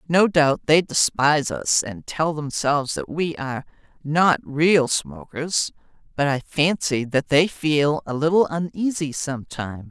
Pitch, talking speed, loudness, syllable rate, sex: 150 Hz, 145 wpm, -21 LUFS, 4.2 syllables/s, female